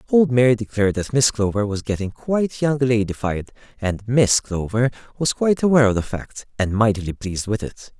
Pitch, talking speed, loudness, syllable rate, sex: 115 Hz, 190 wpm, -20 LUFS, 5.7 syllables/s, male